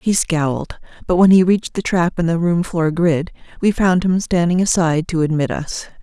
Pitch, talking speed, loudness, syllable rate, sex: 170 Hz, 210 wpm, -17 LUFS, 5.1 syllables/s, female